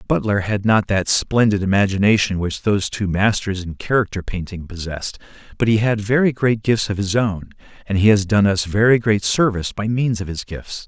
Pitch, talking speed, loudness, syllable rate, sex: 100 Hz, 200 wpm, -18 LUFS, 5.4 syllables/s, male